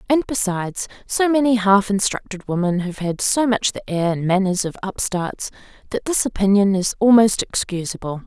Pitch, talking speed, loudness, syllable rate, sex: 205 Hz, 165 wpm, -19 LUFS, 5.0 syllables/s, female